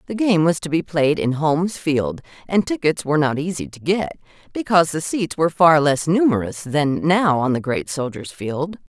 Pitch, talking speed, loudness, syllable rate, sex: 155 Hz, 200 wpm, -19 LUFS, 5.0 syllables/s, female